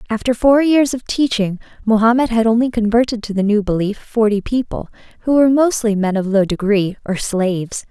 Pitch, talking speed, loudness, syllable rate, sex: 225 Hz, 180 wpm, -16 LUFS, 5.4 syllables/s, female